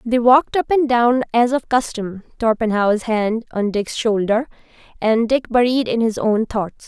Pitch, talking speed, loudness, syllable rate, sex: 230 Hz, 175 wpm, -18 LUFS, 4.4 syllables/s, female